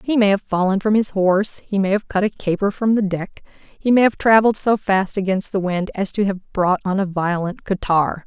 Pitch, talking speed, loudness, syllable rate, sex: 195 Hz, 240 wpm, -19 LUFS, 5.2 syllables/s, female